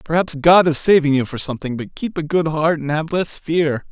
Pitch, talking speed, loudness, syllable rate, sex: 155 Hz, 245 wpm, -17 LUFS, 5.3 syllables/s, male